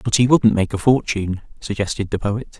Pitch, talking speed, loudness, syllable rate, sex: 105 Hz, 210 wpm, -19 LUFS, 5.6 syllables/s, male